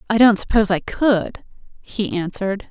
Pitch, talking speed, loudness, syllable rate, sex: 205 Hz, 155 wpm, -19 LUFS, 5.1 syllables/s, female